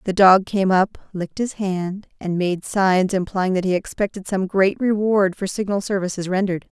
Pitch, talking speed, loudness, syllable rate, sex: 190 Hz, 185 wpm, -20 LUFS, 4.9 syllables/s, female